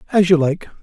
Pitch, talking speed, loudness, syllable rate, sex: 165 Hz, 220 wpm, -16 LUFS, 6.8 syllables/s, male